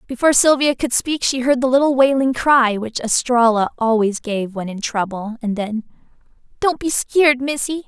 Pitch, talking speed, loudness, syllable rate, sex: 250 Hz, 175 wpm, -17 LUFS, 5.0 syllables/s, female